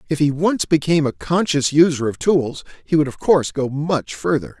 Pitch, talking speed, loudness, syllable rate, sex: 145 Hz, 210 wpm, -18 LUFS, 5.2 syllables/s, male